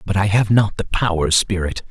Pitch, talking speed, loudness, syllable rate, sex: 95 Hz, 220 wpm, -18 LUFS, 5.2 syllables/s, male